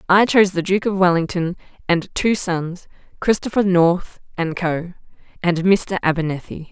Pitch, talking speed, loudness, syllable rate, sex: 180 Hz, 145 wpm, -19 LUFS, 4.6 syllables/s, female